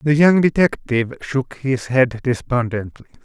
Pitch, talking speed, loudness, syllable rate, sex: 130 Hz, 130 wpm, -18 LUFS, 4.5 syllables/s, male